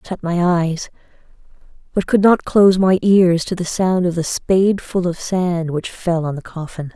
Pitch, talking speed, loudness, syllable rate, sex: 175 Hz, 200 wpm, -17 LUFS, 4.7 syllables/s, female